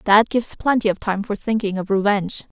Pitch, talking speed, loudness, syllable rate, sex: 205 Hz, 210 wpm, -20 LUFS, 6.0 syllables/s, female